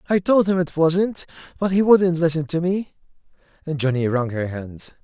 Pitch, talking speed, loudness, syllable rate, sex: 165 Hz, 190 wpm, -20 LUFS, 4.7 syllables/s, male